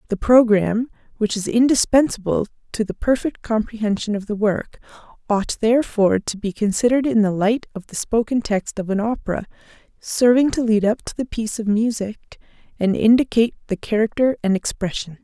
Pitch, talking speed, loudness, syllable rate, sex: 220 Hz, 165 wpm, -20 LUFS, 4.8 syllables/s, female